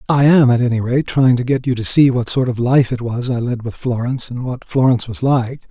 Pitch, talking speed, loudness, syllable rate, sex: 125 Hz, 275 wpm, -16 LUFS, 5.7 syllables/s, male